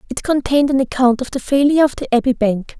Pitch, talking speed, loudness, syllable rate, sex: 260 Hz, 235 wpm, -16 LUFS, 6.6 syllables/s, female